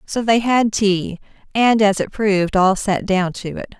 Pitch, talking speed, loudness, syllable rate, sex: 205 Hz, 205 wpm, -17 LUFS, 4.3 syllables/s, female